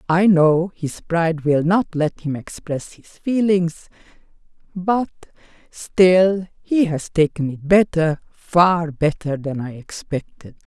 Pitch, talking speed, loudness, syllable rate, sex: 170 Hz, 130 wpm, -19 LUFS, 3.6 syllables/s, female